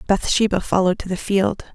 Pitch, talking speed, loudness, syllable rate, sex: 195 Hz, 170 wpm, -20 LUFS, 6.0 syllables/s, female